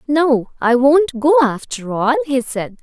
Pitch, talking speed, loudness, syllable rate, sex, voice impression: 270 Hz, 170 wpm, -16 LUFS, 3.7 syllables/s, female, feminine, slightly young, cute, slightly refreshing, friendly, slightly kind